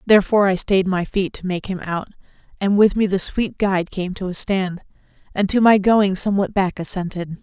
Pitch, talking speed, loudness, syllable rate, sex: 190 Hz, 210 wpm, -19 LUFS, 5.4 syllables/s, female